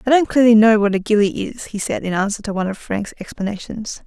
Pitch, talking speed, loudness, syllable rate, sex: 215 Hz, 250 wpm, -18 LUFS, 6.2 syllables/s, female